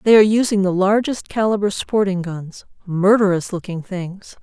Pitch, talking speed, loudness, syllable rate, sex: 195 Hz, 135 wpm, -18 LUFS, 5.0 syllables/s, female